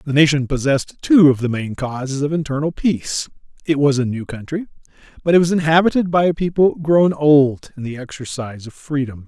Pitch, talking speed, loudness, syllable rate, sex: 145 Hz, 195 wpm, -17 LUFS, 5.6 syllables/s, male